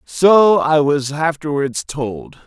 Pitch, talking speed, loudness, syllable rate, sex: 150 Hz, 120 wpm, -16 LUFS, 3.1 syllables/s, male